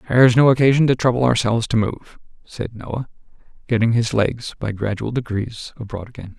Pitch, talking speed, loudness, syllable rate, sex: 115 Hz, 170 wpm, -19 LUFS, 5.5 syllables/s, male